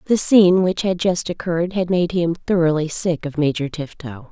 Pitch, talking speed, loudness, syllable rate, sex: 170 Hz, 195 wpm, -19 LUFS, 5.2 syllables/s, female